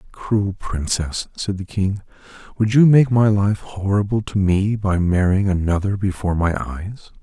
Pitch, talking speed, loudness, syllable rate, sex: 100 Hz, 160 wpm, -19 LUFS, 4.3 syllables/s, male